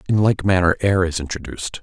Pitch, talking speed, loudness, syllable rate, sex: 90 Hz, 200 wpm, -19 LUFS, 6.1 syllables/s, male